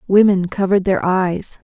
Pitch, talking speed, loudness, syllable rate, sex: 190 Hz, 140 wpm, -16 LUFS, 4.8 syllables/s, female